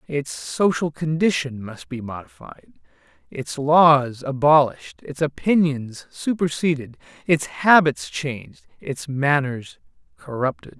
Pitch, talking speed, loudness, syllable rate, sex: 145 Hz, 100 wpm, -21 LUFS, 3.9 syllables/s, male